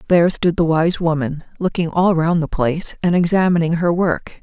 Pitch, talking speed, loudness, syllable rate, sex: 170 Hz, 190 wpm, -17 LUFS, 5.3 syllables/s, female